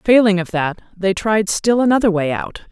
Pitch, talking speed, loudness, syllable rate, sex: 200 Hz, 200 wpm, -17 LUFS, 4.8 syllables/s, female